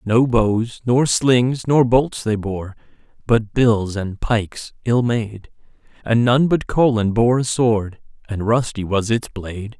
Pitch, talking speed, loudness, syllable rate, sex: 115 Hz, 160 wpm, -18 LUFS, 3.7 syllables/s, male